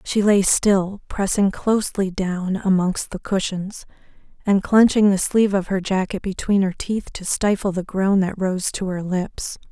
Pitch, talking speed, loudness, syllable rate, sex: 195 Hz, 175 wpm, -20 LUFS, 4.3 syllables/s, female